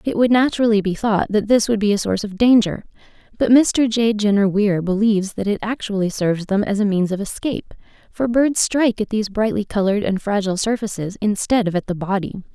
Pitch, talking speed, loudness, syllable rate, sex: 210 Hz, 210 wpm, -19 LUFS, 6.1 syllables/s, female